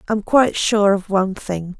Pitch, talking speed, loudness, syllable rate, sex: 200 Hz, 200 wpm, -18 LUFS, 5.0 syllables/s, female